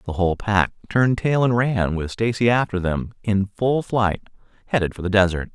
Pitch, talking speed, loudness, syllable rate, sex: 105 Hz, 195 wpm, -21 LUFS, 5.2 syllables/s, male